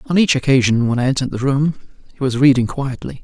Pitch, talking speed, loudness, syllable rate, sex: 135 Hz, 225 wpm, -17 LUFS, 6.5 syllables/s, male